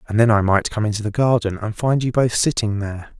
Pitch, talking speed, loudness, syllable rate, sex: 110 Hz, 265 wpm, -19 LUFS, 6.0 syllables/s, male